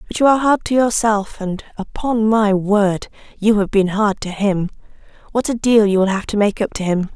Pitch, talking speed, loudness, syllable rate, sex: 210 Hz, 225 wpm, -17 LUFS, 5.1 syllables/s, female